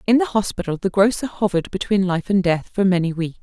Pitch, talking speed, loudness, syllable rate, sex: 195 Hz, 230 wpm, -20 LUFS, 6.2 syllables/s, female